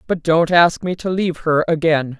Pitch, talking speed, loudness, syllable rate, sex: 165 Hz, 220 wpm, -17 LUFS, 5.0 syllables/s, female